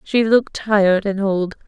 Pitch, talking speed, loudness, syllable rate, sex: 200 Hz, 180 wpm, -17 LUFS, 4.7 syllables/s, female